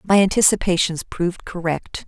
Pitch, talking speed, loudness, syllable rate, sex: 180 Hz, 115 wpm, -19 LUFS, 5.1 syllables/s, female